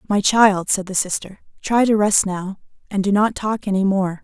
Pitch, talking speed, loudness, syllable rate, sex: 200 Hz, 210 wpm, -18 LUFS, 4.8 syllables/s, female